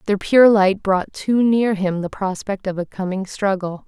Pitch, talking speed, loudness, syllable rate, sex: 195 Hz, 200 wpm, -18 LUFS, 4.3 syllables/s, female